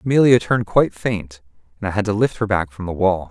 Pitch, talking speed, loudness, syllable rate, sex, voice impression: 100 Hz, 255 wpm, -19 LUFS, 6.4 syllables/s, male, masculine, very adult-like, middle-aged, thick, tensed, powerful, slightly bright, soft, very clear, very fluent, slightly raspy, very cool, very intellectual, refreshing, sincere, very calm, mature, very friendly, very reassuring, elegant, very sweet, slightly lively, very kind